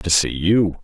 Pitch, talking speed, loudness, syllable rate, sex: 90 Hz, 215 wpm, -18 LUFS, 3.9 syllables/s, male